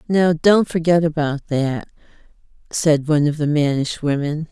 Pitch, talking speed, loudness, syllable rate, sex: 155 Hz, 145 wpm, -18 LUFS, 4.5 syllables/s, female